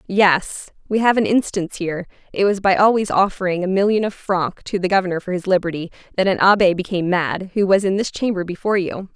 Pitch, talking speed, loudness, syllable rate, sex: 190 Hz, 215 wpm, -18 LUFS, 6.1 syllables/s, female